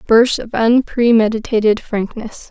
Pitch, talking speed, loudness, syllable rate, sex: 225 Hz, 95 wpm, -15 LUFS, 4.3 syllables/s, female